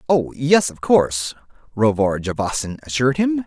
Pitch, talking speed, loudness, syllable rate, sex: 130 Hz, 140 wpm, -19 LUFS, 5.0 syllables/s, male